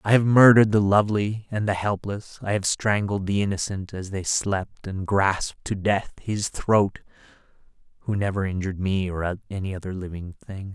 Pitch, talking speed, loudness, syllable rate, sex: 100 Hz, 175 wpm, -23 LUFS, 5.0 syllables/s, male